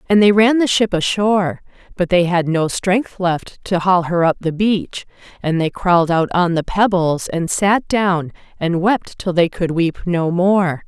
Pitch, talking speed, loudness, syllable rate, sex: 180 Hz, 200 wpm, -17 LUFS, 4.2 syllables/s, female